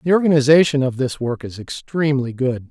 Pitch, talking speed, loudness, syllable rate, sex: 135 Hz, 180 wpm, -18 LUFS, 5.8 syllables/s, male